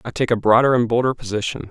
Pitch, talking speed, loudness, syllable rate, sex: 120 Hz, 245 wpm, -18 LUFS, 6.9 syllables/s, male